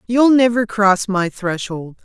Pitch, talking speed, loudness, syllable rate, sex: 210 Hz, 145 wpm, -16 LUFS, 3.8 syllables/s, female